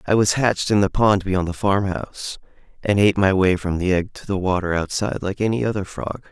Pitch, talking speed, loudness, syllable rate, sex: 95 Hz, 235 wpm, -20 LUFS, 6.0 syllables/s, male